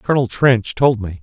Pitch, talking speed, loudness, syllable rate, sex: 115 Hz, 195 wpm, -16 LUFS, 5.0 syllables/s, male